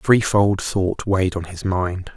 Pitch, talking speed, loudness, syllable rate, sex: 95 Hz, 195 wpm, -20 LUFS, 4.3 syllables/s, male